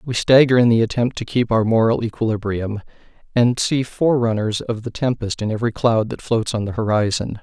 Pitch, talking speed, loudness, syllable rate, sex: 115 Hz, 195 wpm, -19 LUFS, 5.6 syllables/s, male